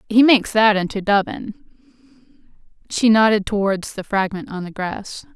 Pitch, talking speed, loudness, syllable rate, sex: 210 Hz, 145 wpm, -18 LUFS, 4.9 syllables/s, female